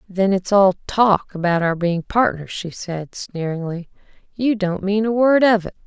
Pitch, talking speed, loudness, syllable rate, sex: 190 Hz, 185 wpm, -19 LUFS, 4.4 syllables/s, female